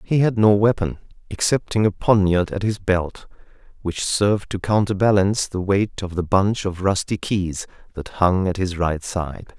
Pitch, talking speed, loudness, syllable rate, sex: 100 Hz, 175 wpm, -20 LUFS, 4.5 syllables/s, male